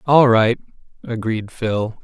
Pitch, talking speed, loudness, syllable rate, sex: 115 Hz, 120 wpm, -18 LUFS, 3.6 syllables/s, male